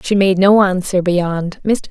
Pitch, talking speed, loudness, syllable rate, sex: 190 Hz, 190 wpm, -14 LUFS, 3.9 syllables/s, female